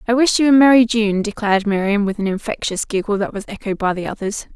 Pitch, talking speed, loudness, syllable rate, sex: 215 Hz, 235 wpm, -17 LUFS, 6.3 syllables/s, female